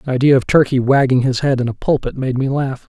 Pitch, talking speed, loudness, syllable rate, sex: 130 Hz, 260 wpm, -16 LUFS, 5.9 syllables/s, male